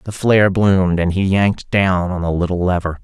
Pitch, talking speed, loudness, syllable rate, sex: 95 Hz, 215 wpm, -16 LUFS, 5.5 syllables/s, male